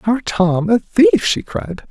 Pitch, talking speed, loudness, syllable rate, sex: 185 Hz, 190 wpm, -16 LUFS, 3.4 syllables/s, male